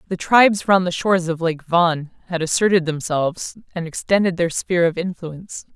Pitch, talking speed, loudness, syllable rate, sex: 175 Hz, 175 wpm, -19 LUFS, 5.5 syllables/s, female